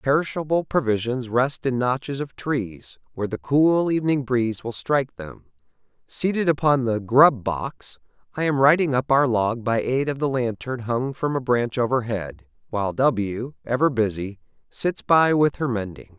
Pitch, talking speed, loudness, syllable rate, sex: 125 Hz, 165 wpm, -22 LUFS, 4.6 syllables/s, male